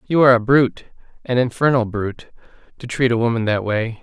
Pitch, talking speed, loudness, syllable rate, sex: 120 Hz, 195 wpm, -18 LUFS, 6.3 syllables/s, male